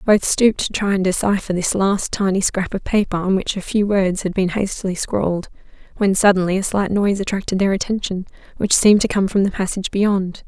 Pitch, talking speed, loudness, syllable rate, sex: 195 Hz, 210 wpm, -18 LUFS, 5.8 syllables/s, female